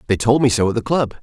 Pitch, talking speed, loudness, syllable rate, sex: 120 Hz, 345 wpm, -17 LUFS, 7.0 syllables/s, male